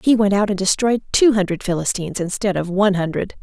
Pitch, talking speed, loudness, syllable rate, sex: 195 Hz, 210 wpm, -18 LUFS, 6.2 syllables/s, female